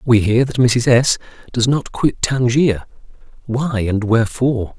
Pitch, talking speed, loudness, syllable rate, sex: 120 Hz, 150 wpm, -17 LUFS, 4.3 syllables/s, male